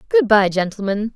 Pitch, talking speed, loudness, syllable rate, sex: 220 Hz, 155 wpm, -17 LUFS, 5.2 syllables/s, female